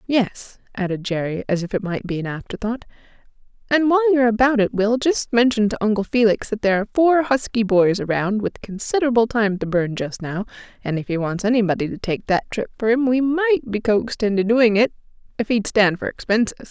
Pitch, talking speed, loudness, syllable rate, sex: 220 Hz, 210 wpm, -20 LUFS, 5.8 syllables/s, female